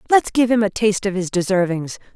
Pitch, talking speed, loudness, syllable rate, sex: 205 Hz, 220 wpm, -19 LUFS, 6.0 syllables/s, female